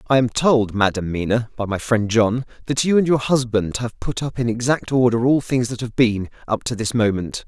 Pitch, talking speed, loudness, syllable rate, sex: 115 Hz, 235 wpm, -20 LUFS, 5.1 syllables/s, male